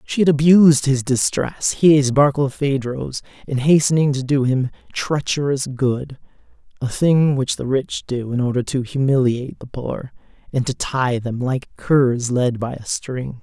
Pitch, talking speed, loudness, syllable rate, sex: 135 Hz, 150 wpm, -19 LUFS, 4.2 syllables/s, male